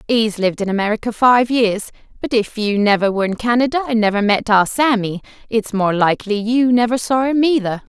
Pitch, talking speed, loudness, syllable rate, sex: 225 Hz, 195 wpm, -16 LUFS, 5.7 syllables/s, female